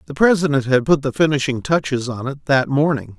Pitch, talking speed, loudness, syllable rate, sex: 140 Hz, 205 wpm, -18 LUFS, 5.6 syllables/s, male